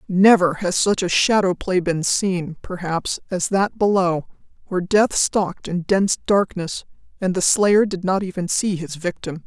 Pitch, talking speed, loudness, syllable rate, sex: 185 Hz, 170 wpm, -20 LUFS, 4.5 syllables/s, female